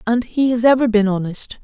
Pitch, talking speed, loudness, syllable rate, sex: 230 Hz, 220 wpm, -17 LUFS, 5.3 syllables/s, female